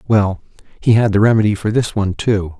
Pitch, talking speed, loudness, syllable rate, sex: 105 Hz, 210 wpm, -16 LUFS, 5.7 syllables/s, male